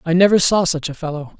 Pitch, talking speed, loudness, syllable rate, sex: 170 Hz, 260 wpm, -17 LUFS, 6.4 syllables/s, male